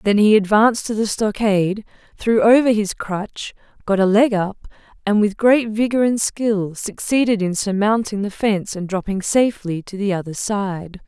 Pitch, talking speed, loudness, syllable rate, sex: 210 Hz, 175 wpm, -18 LUFS, 4.8 syllables/s, female